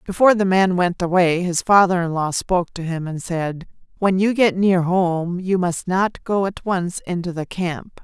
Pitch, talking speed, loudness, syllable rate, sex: 180 Hz, 210 wpm, -19 LUFS, 4.5 syllables/s, female